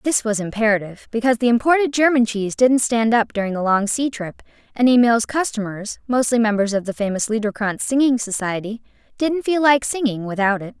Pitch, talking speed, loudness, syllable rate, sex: 230 Hz, 185 wpm, -19 LUFS, 5.8 syllables/s, female